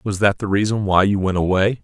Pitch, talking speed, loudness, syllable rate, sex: 100 Hz, 260 wpm, -18 LUFS, 5.6 syllables/s, male